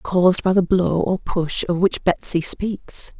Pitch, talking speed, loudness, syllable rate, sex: 180 Hz, 190 wpm, -20 LUFS, 3.9 syllables/s, female